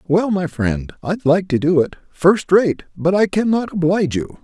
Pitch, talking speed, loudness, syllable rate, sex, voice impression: 175 Hz, 215 wpm, -17 LUFS, 4.6 syllables/s, male, masculine, slightly old, powerful, bright, clear, fluent, intellectual, calm, mature, friendly, reassuring, wild, lively, slightly strict